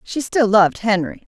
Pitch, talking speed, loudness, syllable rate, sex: 215 Hz, 180 wpm, -17 LUFS, 5.1 syllables/s, female